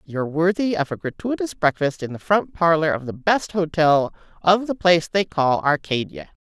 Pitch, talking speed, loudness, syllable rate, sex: 165 Hz, 185 wpm, -21 LUFS, 5.1 syllables/s, female